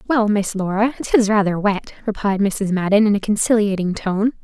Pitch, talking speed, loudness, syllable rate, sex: 205 Hz, 190 wpm, -18 LUFS, 5.2 syllables/s, female